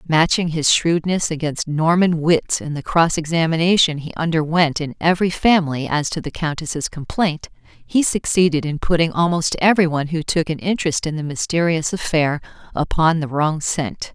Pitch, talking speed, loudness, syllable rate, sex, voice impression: 160 Hz, 160 wpm, -19 LUFS, 5.0 syllables/s, female, feminine, middle-aged, tensed, powerful, slightly hard, clear, fluent, intellectual, calm, elegant, lively, slightly sharp